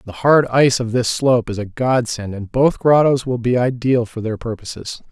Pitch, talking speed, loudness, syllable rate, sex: 120 Hz, 210 wpm, -17 LUFS, 5.1 syllables/s, male